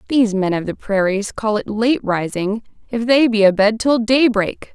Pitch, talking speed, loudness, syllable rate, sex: 215 Hz, 190 wpm, -17 LUFS, 4.7 syllables/s, female